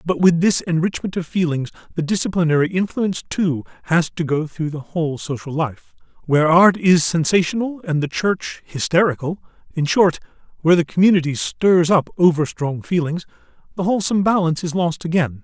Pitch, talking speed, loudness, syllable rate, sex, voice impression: 170 Hz, 150 wpm, -19 LUFS, 5.6 syllables/s, male, masculine, middle-aged, tensed, powerful, soft, slightly muffled, raspy, slightly mature, friendly, reassuring, wild, lively, kind